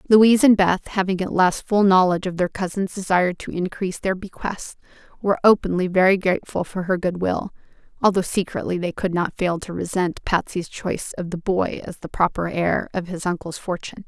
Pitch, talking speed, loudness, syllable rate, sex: 185 Hz, 190 wpm, -21 LUFS, 5.6 syllables/s, female